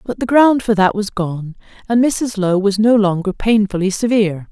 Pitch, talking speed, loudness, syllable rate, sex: 210 Hz, 200 wpm, -15 LUFS, 4.9 syllables/s, female